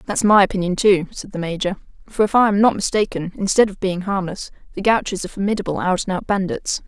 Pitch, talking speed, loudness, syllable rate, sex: 195 Hz, 220 wpm, -19 LUFS, 6.2 syllables/s, female